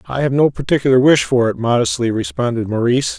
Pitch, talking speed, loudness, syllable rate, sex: 125 Hz, 190 wpm, -16 LUFS, 6.2 syllables/s, male